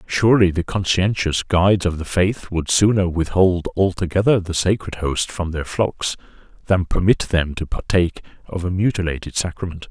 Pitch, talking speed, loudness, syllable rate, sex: 90 Hz, 155 wpm, -19 LUFS, 5.0 syllables/s, male